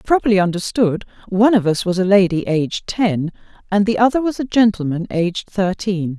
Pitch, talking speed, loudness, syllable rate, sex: 195 Hz, 175 wpm, -17 LUFS, 5.5 syllables/s, female